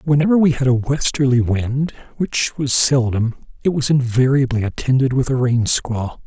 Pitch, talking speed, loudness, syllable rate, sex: 130 Hz, 165 wpm, -18 LUFS, 4.8 syllables/s, male